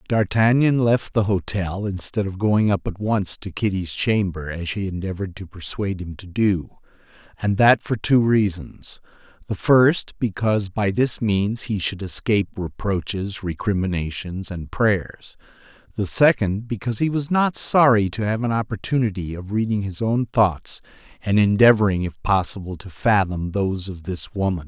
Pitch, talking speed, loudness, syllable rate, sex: 100 Hz, 155 wpm, -21 LUFS, 4.7 syllables/s, male